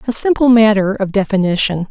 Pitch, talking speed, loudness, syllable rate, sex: 210 Hz, 155 wpm, -13 LUFS, 5.7 syllables/s, female